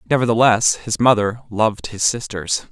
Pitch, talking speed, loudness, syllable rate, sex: 110 Hz, 135 wpm, -18 LUFS, 5.0 syllables/s, male